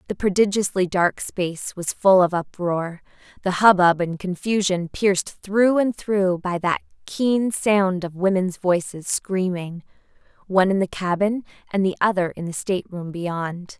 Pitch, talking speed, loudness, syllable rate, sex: 185 Hz, 150 wpm, -21 LUFS, 4.4 syllables/s, female